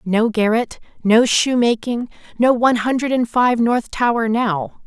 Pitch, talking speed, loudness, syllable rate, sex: 230 Hz, 150 wpm, -17 LUFS, 4.3 syllables/s, female